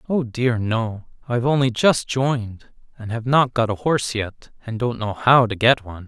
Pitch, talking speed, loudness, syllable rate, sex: 120 Hz, 205 wpm, -20 LUFS, 4.9 syllables/s, male